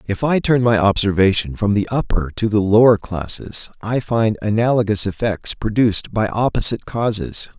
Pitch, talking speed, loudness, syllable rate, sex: 105 Hz, 160 wpm, -18 LUFS, 5.0 syllables/s, male